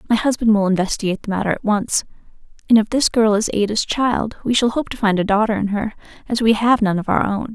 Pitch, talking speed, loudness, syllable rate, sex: 215 Hz, 245 wpm, -18 LUFS, 6.2 syllables/s, female